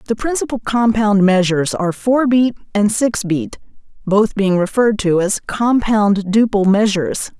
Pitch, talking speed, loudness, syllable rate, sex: 210 Hz, 145 wpm, -15 LUFS, 4.7 syllables/s, female